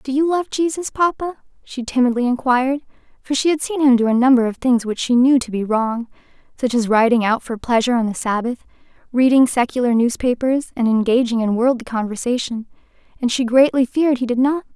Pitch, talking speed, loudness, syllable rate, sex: 250 Hz, 185 wpm, -18 LUFS, 5.8 syllables/s, female